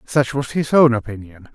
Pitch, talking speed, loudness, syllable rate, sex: 125 Hz, 195 wpm, -17 LUFS, 5.0 syllables/s, male